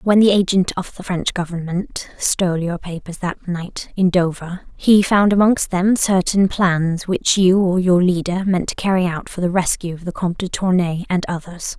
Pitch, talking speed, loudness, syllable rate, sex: 180 Hz, 200 wpm, -18 LUFS, 4.7 syllables/s, female